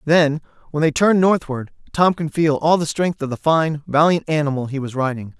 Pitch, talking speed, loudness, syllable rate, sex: 150 Hz, 210 wpm, -19 LUFS, 5.3 syllables/s, male